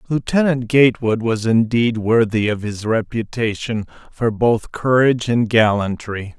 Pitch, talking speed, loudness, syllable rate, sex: 115 Hz, 120 wpm, -18 LUFS, 4.4 syllables/s, male